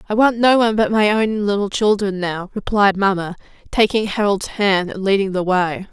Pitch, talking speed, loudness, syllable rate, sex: 200 Hz, 195 wpm, -17 LUFS, 5.1 syllables/s, female